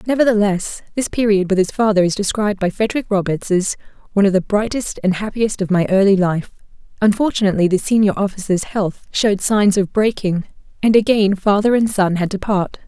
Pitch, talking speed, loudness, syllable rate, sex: 200 Hz, 175 wpm, -17 LUFS, 5.8 syllables/s, female